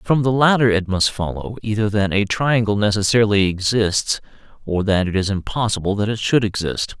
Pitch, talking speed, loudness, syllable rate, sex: 105 Hz, 180 wpm, -19 LUFS, 5.3 syllables/s, male